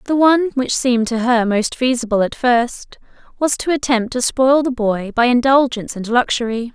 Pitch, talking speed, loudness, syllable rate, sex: 245 Hz, 185 wpm, -16 LUFS, 5.1 syllables/s, female